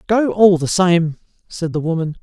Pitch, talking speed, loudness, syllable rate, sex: 175 Hz, 190 wpm, -16 LUFS, 4.7 syllables/s, male